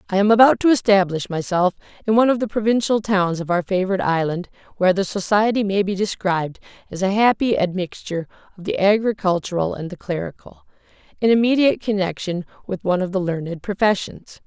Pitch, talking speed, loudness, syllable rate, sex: 195 Hz, 170 wpm, -20 LUFS, 4.5 syllables/s, female